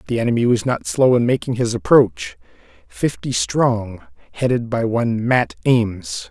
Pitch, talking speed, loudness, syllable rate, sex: 120 Hz, 145 wpm, -18 LUFS, 4.4 syllables/s, male